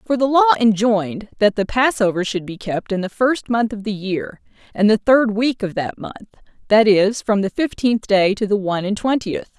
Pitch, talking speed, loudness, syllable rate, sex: 215 Hz, 220 wpm, -18 LUFS, 5.1 syllables/s, female